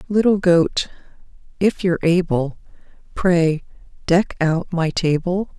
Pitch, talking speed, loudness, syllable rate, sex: 175 Hz, 105 wpm, -19 LUFS, 3.9 syllables/s, female